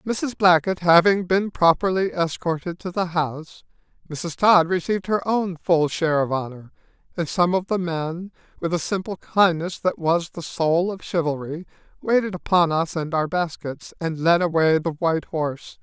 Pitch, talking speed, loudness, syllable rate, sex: 170 Hz, 170 wpm, -22 LUFS, 4.7 syllables/s, male